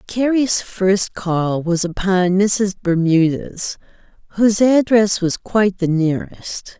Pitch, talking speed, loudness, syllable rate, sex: 195 Hz, 115 wpm, -17 LUFS, 3.7 syllables/s, female